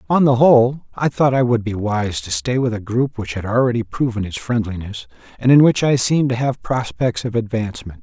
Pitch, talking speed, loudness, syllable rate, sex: 115 Hz, 225 wpm, -18 LUFS, 5.5 syllables/s, male